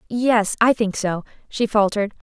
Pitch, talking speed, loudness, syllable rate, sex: 215 Hz, 130 wpm, -20 LUFS, 4.9 syllables/s, female